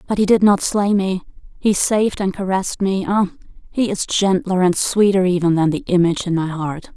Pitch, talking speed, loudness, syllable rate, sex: 190 Hz, 205 wpm, -18 LUFS, 5.6 syllables/s, female